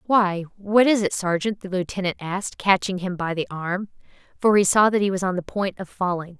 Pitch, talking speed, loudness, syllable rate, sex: 190 Hz, 225 wpm, -22 LUFS, 5.4 syllables/s, female